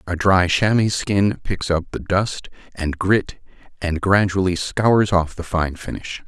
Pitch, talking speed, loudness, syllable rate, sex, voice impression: 90 Hz, 165 wpm, -20 LUFS, 3.9 syllables/s, male, very masculine, very adult-like, middle-aged, very thick, slightly tensed, powerful, bright, slightly soft, muffled, fluent, very cool, very intellectual, very sincere, very calm, very mature, friendly, reassuring, very wild, slightly lively, kind